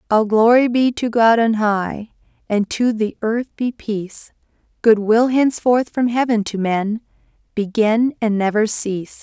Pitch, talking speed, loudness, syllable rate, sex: 225 Hz, 155 wpm, -17 LUFS, 4.3 syllables/s, female